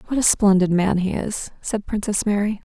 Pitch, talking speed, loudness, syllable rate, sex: 200 Hz, 200 wpm, -20 LUFS, 5.1 syllables/s, female